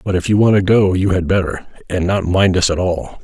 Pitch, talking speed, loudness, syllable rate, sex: 90 Hz, 280 wpm, -15 LUFS, 5.5 syllables/s, male